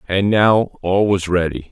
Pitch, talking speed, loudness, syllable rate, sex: 95 Hz, 175 wpm, -16 LUFS, 4.2 syllables/s, male